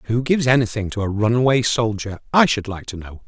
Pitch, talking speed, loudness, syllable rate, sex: 115 Hz, 220 wpm, -19 LUFS, 6.1 syllables/s, male